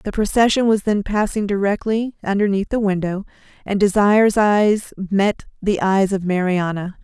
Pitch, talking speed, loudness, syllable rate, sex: 200 Hz, 145 wpm, -18 LUFS, 4.9 syllables/s, female